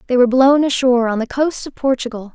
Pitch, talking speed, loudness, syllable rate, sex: 255 Hz, 230 wpm, -16 LUFS, 6.5 syllables/s, female